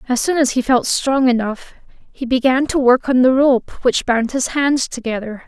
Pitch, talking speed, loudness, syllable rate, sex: 255 Hz, 210 wpm, -16 LUFS, 4.7 syllables/s, female